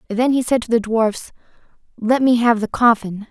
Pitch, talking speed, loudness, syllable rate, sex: 230 Hz, 200 wpm, -17 LUFS, 4.9 syllables/s, female